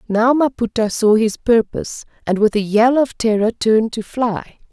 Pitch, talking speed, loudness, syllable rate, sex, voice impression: 225 Hz, 180 wpm, -17 LUFS, 4.8 syllables/s, female, feminine, adult-like, sincere, slightly calm, slightly friendly